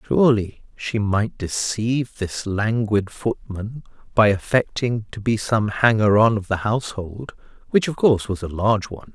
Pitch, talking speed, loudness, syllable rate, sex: 110 Hz, 155 wpm, -21 LUFS, 4.7 syllables/s, male